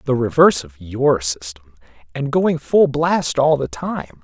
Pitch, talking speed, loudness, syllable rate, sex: 125 Hz, 170 wpm, -18 LUFS, 4.1 syllables/s, male